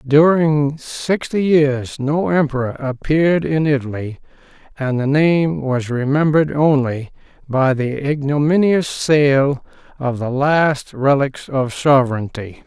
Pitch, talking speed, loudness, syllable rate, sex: 140 Hz, 115 wpm, -17 LUFS, 3.8 syllables/s, male